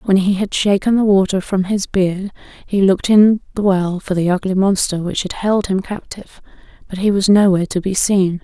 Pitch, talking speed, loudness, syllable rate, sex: 195 Hz, 215 wpm, -16 LUFS, 5.3 syllables/s, female